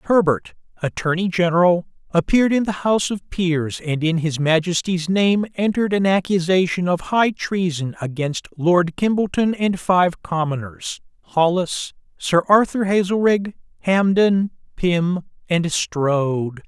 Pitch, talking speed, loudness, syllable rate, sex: 180 Hz, 120 wpm, -19 LUFS, 4.3 syllables/s, male